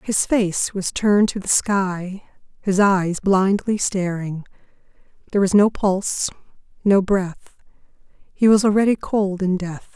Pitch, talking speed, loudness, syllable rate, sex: 195 Hz, 140 wpm, -19 LUFS, 4.1 syllables/s, female